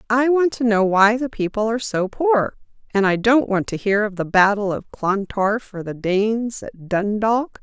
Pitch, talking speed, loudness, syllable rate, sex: 215 Hz, 205 wpm, -19 LUFS, 4.6 syllables/s, female